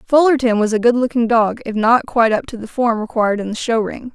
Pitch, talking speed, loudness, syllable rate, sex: 230 Hz, 260 wpm, -16 LUFS, 6.0 syllables/s, female